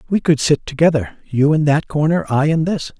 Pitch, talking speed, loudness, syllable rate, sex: 155 Hz, 220 wpm, -16 LUFS, 5.3 syllables/s, male